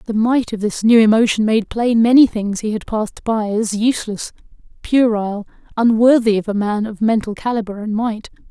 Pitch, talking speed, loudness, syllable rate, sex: 220 Hz, 185 wpm, -16 LUFS, 5.2 syllables/s, female